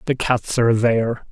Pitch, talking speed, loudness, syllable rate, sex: 115 Hz, 180 wpm, -19 LUFS, 5.3 syllables/s, male